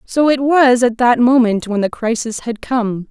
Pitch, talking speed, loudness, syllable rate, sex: 240 Hz, 210 wpm, -15 LUFS, 4.3 syllables/s, female